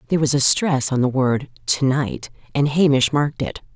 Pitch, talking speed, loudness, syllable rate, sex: 140 Hz, 210 wpm, -19 LUFS, 5.2 syllables/s, female